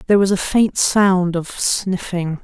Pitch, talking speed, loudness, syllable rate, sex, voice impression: 185 Hz, 175 wpm, -17 LUFS, 4.0 syllables/s, female, feminine, very adult-like, slightly clear, calm, slightly strict